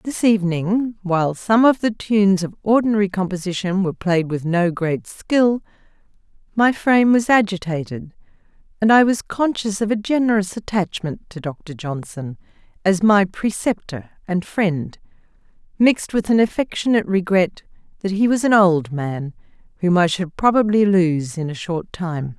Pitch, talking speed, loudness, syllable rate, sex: 195 Hz, 150 wpm, -19 LUFS, 4.7 syllables/s, female